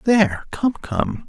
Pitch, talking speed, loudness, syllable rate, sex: 170 Hz, 140 wpm, -21 LUFS, 3.6 syllables/s, male